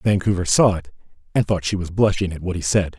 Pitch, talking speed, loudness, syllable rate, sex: 95 Hz, 240 wpm, -20 LUFS, 6.0 syllables/s, male